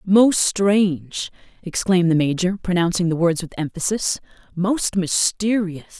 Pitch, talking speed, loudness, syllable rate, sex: 185 Hz, 110 wpm, -20 LUFS, 4.3 syllables/s, female